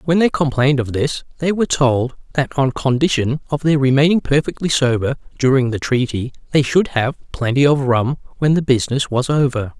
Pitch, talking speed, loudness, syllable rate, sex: 135 Hz, 185 wpm, -17 LUFS, 5.5 syllables/s, male